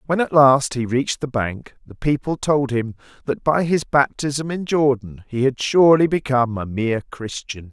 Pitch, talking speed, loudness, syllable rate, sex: 135 Hz, 185 wpm, -19 LUFS, 4.8 syllables/s, male